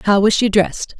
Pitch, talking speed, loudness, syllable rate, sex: 205 Hz, 240 wpm, -15 LUFS, 6.0 syllables/s, female